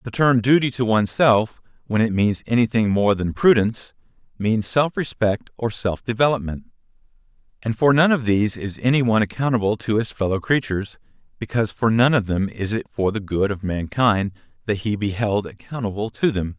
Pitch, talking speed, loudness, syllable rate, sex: 110 Hz, 180 wpm, -20 LUFS, 5.5 syllables/s, male